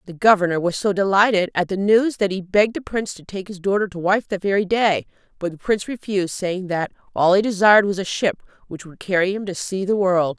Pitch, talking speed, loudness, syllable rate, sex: 190 Hz, 245 wpm, -20 LUFS, 6.0 syllables/s, female